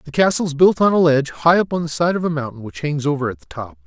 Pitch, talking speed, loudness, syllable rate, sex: 160 Hz, 325 wpm, -18 LUFS, 6.8 syllables/s, male